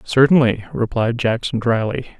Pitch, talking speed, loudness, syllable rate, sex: 120 Hz, 110 wpm, -18 LUFS, 5.0 syllables/s, male